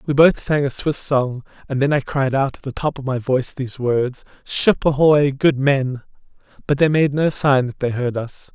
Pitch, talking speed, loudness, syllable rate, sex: 135 Hz, 225 wpm, -19 LUFS, 4.8 syllables/s, male